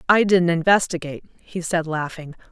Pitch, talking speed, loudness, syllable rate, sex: 170 Hz, 145 wpm, -20 LUFS, 5.2 syllables/s, female